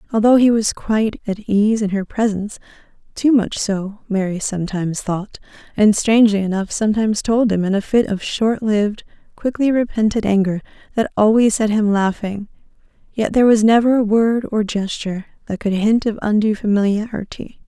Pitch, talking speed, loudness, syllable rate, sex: 210 Hz, 165 wpm, -17 LUFS, 5.4 syllables/s, female